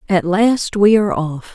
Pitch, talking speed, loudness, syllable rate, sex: 195 Hz, 195 wpm, -15 LUFS, 4.4 syllables/s, female